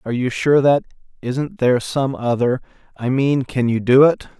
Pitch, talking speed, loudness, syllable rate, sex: 130 Hz, 165 wpm, -18 LUFS, 4.8 syllables/s, male